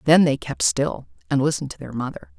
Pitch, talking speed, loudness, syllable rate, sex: 125 Hz, 225 wpm, -22 LUFS, 6.0 syllables/s, female